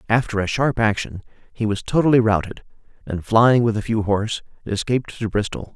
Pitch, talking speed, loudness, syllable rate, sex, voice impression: 110 Hz, 175 wpm, -20 LUFS, 5.6 syllables/s, male, masculine, adult-like, relaxed, weak, slightly dark, slightly muffled, intellectual, sincere, calm, reassuring, slightly wild, kind, modest